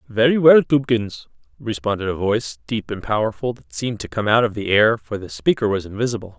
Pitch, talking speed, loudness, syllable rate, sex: 110 Hz, 205 wpm, -19 LUFS, 6.0 syllables/s, male